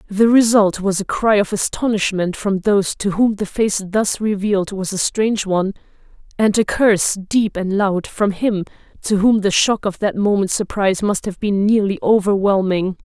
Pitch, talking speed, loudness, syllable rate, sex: 200 Hz, 185 wpm, -17 LUFS, 4.9 syllables/s, female